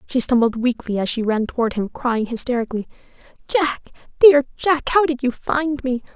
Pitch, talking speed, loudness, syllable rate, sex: 255 Hz, 175 wpm, -19 LUFS, 5.1 syllables/s, female